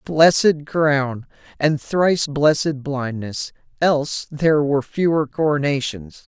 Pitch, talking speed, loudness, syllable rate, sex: 145 Hz, 95 wpm, -19 LUFS, 4.0 syllables/s, male